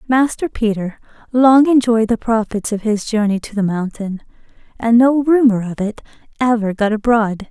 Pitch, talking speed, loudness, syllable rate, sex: 225 Hz, 160 wpm, -16 LUFS, 4.8 syllables/s, female